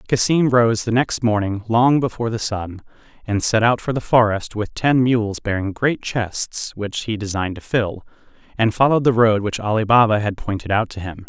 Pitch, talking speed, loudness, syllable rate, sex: 110 Hz, 200 wpm, -19 LUFS, 5.1 syllables/s, male